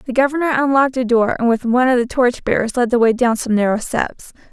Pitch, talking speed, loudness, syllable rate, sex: 245 Hz, 250 wpm, -16 LUFS, 6.1 syllables/s, female